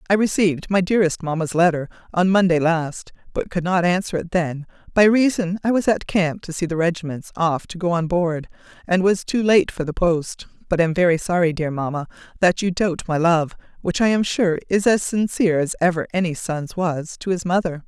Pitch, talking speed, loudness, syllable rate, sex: 175 Hz, 210 wpm, -20 LUFS, 5.3 syllables/s, female